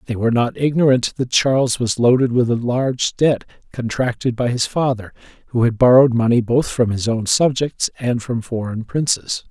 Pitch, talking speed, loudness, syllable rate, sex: 125 Hz, 185 wpm, -18 LUFS, 5.2 syllables/s, male